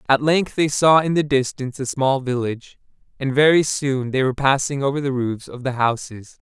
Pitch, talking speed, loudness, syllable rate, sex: 135 Hz, 205 wpm, -20 LUFS, 5.3 syllables/s, male